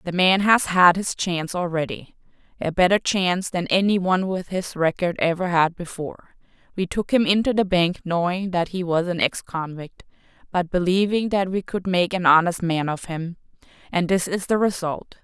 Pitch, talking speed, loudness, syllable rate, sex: 180 Hz, 180 wpm, -21 LUFS, 5.0 syllables/s, female